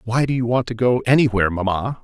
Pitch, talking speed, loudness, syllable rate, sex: 115 Hz, 235 wpm, -19 LUFS, 6.4 syllables/s, male